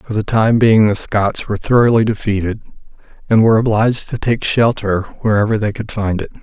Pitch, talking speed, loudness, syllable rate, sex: 110 Hz, 185 wpm, -15 LUFS, 5.6 syllables/s, male